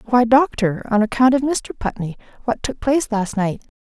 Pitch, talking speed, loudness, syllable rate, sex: 235 Hz, 175 wpm, -19 LUFS, 5.1 syllables/s, female